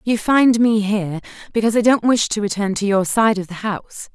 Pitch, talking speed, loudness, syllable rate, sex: 210 Hz, 230 wpm, -18 LUFS, 5.7 syllables/s, female